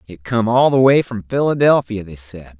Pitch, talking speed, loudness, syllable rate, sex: 115 Hz, 210 wpm, -16 LUFS, 4.9 syllables/s, male